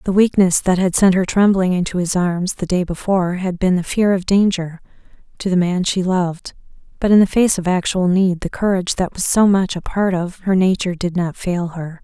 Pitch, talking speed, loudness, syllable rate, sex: 185 Hz, 230 wpm, -17 LUFS, 5.3 syllables/s, female